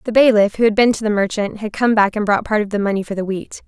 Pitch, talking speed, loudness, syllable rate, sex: 210 Hz, 325 wpm, -17 LUFS, 6.5 syllables/s, female